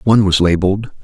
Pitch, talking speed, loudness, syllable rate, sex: 95 Hz, 175 wpm, -14 LUFS, 6.9 syllables/s, male